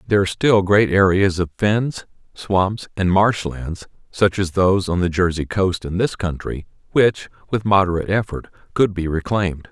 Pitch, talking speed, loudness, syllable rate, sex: 95 Hz, 165 wpm, -19 LUFS, 4.9 syllables/s, male